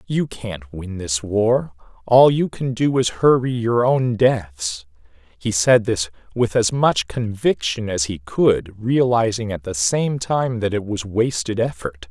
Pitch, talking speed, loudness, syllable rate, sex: 110 Hz, 165 wpm, -19 LUFS, 3.7 syllables/s, male